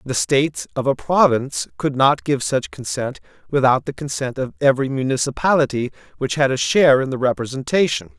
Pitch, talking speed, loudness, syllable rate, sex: 130 Hz, 170 wpm, -19 LUFS, 5.7 syllables/s, male